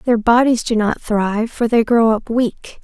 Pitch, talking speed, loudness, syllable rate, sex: 230 Hz, 210 wpm, -16 LUFS, 4.3 syllables/s, female